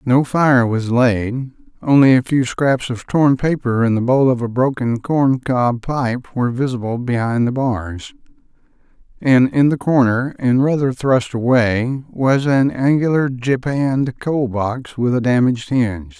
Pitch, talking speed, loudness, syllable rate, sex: 125 Hz, 160 wpm, -17 LUFS, 4.1 syllables/s, male